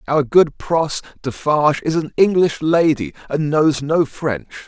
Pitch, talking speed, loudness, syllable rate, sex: 150 Hz, 155 wpm, -17 LUFS, 4.1 syllables/s, male